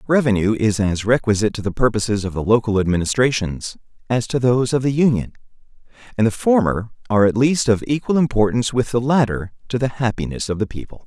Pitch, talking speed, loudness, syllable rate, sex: 115 Hz, 190 wpm, -19 LUFS, 6.3 syllables/s, male